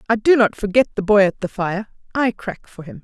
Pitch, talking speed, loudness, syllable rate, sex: 205 Hz, 255 wpm, -18 LUFS, 5.6 syllables/s, female